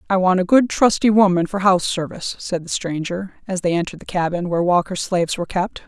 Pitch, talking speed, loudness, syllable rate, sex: 185 Hz, 225 wpm, -19 LUFS, 6.4 syllables/s, female